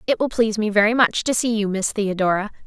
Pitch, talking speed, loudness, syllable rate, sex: 215 Hz, 250 wpm, -20 LUFS, 6.3 syllables/s, female